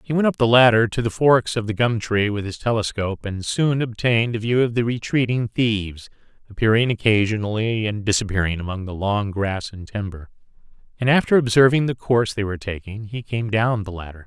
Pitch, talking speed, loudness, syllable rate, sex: 110 Hz, 200 wpm, -20 LUFS, 5.7 syllables/s, male